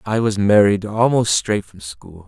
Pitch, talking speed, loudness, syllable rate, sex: 100 Hz, 185 wpm, -17 LUFS, 4.2 syllables/s, male